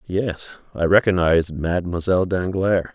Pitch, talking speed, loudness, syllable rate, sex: 90 Hz, 100 wpm, -20 LUFS, 5.0 syllables/s, male